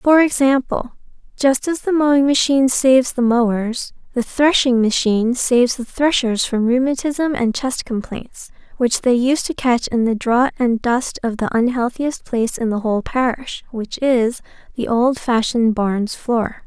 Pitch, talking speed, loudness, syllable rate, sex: 250 Hz, 160 wpm, -17 LUFS, 4.5 syllables/s, female